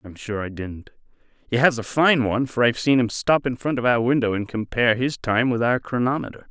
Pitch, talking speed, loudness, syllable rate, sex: 120 Hz, 240 wpm, -21 LUFS, 5.9 syllables/s, male